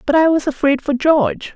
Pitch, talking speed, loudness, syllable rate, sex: 290 Hz, 230 wpm, -16 LUFS, 5.7 syllables/s, female